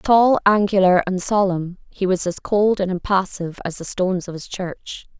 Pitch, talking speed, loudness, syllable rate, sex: 190 Hz, 185 wpm, -20 LUFS, 4.8 syllables/s, female